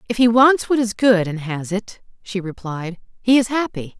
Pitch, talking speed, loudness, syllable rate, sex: 210 Hz, 210 wpm, -19 LUFS, 4.7 syllables/s, female